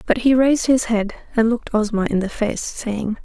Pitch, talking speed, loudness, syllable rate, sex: 225 Hz, 220 wpm, -19 LUFS, 5.3 syllables/s, female